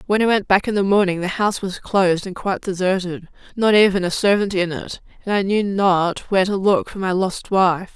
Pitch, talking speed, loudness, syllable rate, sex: 190 Hz, 235 wpm, -19 LUFS, 5.5 syllables/s, female